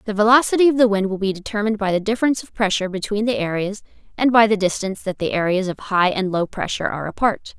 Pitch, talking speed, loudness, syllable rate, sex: 205 Hz, 235 wpm, -19 LUFS, 7.0 syllables/s, female